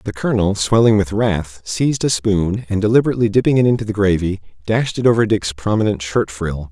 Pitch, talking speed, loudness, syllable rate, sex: 105 Hz, 195 wpm, -17 LUFS, 5.9 syllables/s, male